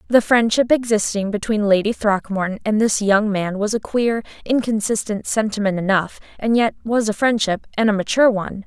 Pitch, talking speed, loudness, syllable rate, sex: 215 Hz, 175 wpm, -19 LUFS, 5.3 syllables/s, female